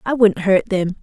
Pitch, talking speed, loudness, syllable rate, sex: 200 Hz, 235 wpm, -17 LUFS, 5.0 syllables/s, female